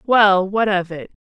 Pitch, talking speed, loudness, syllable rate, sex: 195 Hz, 195 wpm, -16 LUFS, 3.9 syllables/s, female